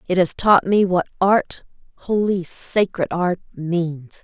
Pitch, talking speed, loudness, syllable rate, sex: 180 Hz, 115 wpm, -19 LUFS, 3.6 syllables/s, female